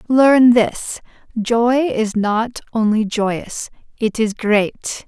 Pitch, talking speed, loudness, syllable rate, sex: 225 Hz, 120 wpm, -17 LUFS, 2.7 syllables/s, female